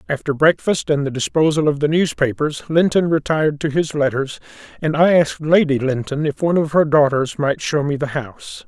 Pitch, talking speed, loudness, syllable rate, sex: 150 Hz, 195 wpm, -18 LUFS, 5.5 syllables/s, male